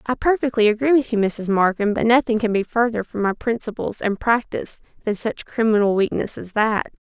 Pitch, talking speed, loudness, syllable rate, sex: 220 Hz, 195 wpm, -20 LUFS, 5.5 syllables/s, female